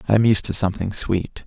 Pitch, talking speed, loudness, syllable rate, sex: 100 Hz, 245 wpm, -20 LUFS, 6.3 syllables/s, male